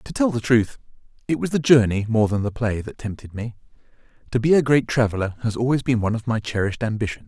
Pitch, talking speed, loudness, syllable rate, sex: 115 Hz, 230 wpm, -21 LUFS, 6.5 syllables/s, male